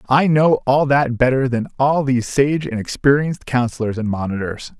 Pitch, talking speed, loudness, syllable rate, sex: 130 Hz, 175 wpm, -18 LUFS, 5.2 syllables/s, male